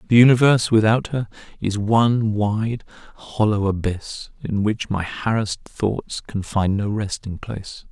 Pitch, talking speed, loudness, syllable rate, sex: 105 Hz, 145 wpm, -21 LUFS, 4.5 syllables/s, male